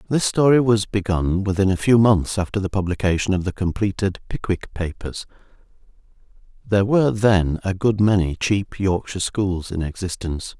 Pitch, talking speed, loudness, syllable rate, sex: 100 Hz, 155 wpm, -20 LUFS, 5.2 syllables/s, male